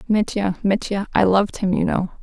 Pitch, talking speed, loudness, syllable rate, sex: 195 Hz, 190 wpm, -20 LUFS, 5.3 syllables/s, female